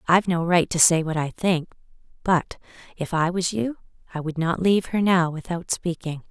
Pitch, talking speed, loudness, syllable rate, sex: 175 Hz, 200 wpm, -23 LUFS, 5.2 syllables/s, female